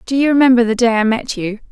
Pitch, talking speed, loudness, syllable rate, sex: 240 Hz, 280 wpm, -14 LUFS, 6.7 syllables/s, female